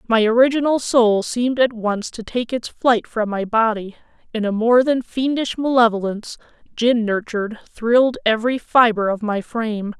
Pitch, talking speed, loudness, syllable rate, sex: 230 Hz, 160 wpm, -19 LUFS, 4.9 syllables/s, female